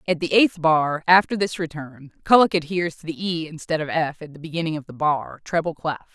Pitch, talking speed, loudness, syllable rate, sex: 160 Hz, 225 wpm, -21 LUFS, 5.6 syllables/s, female